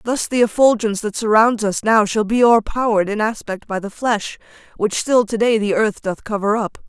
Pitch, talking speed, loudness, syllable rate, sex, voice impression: 215 Hz, 210 wpm, -17 LUFS, 5.4 syllables/s, female, feminine, slightly gender-neutral, adult-like, slightly middle-aged, thin, tensed, powerful, slightly bright, slightly hard, slightly clear, fluent, intellectual, sincere, slightly lively, strict, slightly sharp